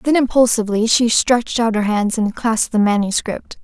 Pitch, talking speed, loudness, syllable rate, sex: 225 Hz, 180 wpm, -16 LUFS, 5.3 syllables/s, female